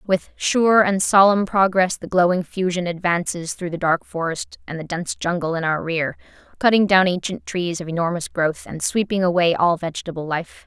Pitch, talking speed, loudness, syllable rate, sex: 175 Hz, 185 wpm, -20 LUFS, 5.1 syllables/s, female